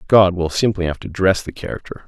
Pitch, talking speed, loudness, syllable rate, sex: 90 Hz, 230 wpm, -18 LUFS, 5.9 syllables/s, male